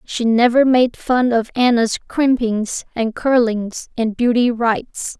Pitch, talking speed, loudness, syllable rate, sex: 235 Hz, 140 wpm, -17 LUFS, 3.8 syllables/s, female